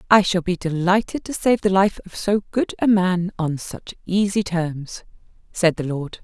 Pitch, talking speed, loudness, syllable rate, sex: 185 Hz, 195 wpm, -21 LUFS, 4.4 syllables/s, female